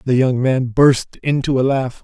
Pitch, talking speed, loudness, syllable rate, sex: 130 Hz, 205 wpm, -16 LUFS, 4.6 syllables/s, male